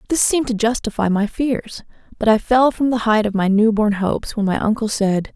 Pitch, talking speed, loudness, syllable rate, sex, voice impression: 220 Hz, 235 wpm, -18 LUFS, 5.5 syllables/s, female, feminine, adult-like, tensed, powerful, slightly soft, slightly raspy, intellectual, calm, elegant, lively, slightly sharp, slightly modest